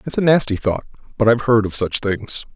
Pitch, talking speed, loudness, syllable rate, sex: 115 Hz, 235 wpm, -18 LUFS, 6.0 syllables/s, male